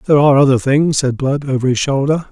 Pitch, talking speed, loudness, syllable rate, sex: 140 Hz, 235 wpm, -14 LUFS, 6.5 syllables/s, male